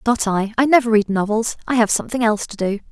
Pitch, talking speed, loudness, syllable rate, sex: 220 Hz, 245 wpm, -18 LUFS, 6.6 syllables/s, female